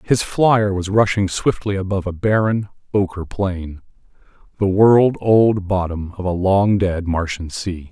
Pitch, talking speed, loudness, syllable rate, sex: 95 Hz, 145 wpm, -18 LUFS, 4.1 syllables/s, male